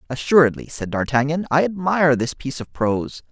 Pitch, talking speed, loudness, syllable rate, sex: 140 Hz, 165 wpm, -20 LUFS, 6.0 syllables/s, male